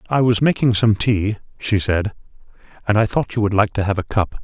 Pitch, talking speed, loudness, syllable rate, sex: 105 Hz, 230 wpm, -19 LUFS, 5.5 syllables/s, male